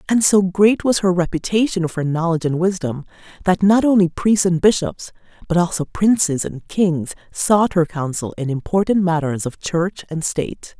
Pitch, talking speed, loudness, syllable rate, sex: 175 Hz, 170 wpm, -18 LUFS, 4.8 syllables/s, female